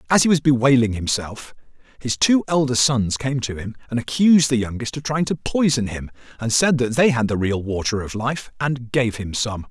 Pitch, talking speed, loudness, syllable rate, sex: 125 Hz, 215 wpm, -20 LUFS, 5.2 syllables/s, male